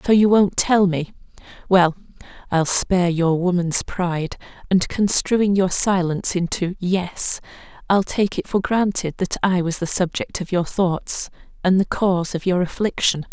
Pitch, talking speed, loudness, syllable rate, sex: 180 Hz, 160 wpm, -20 LUFS, 4.4 syllables/s, female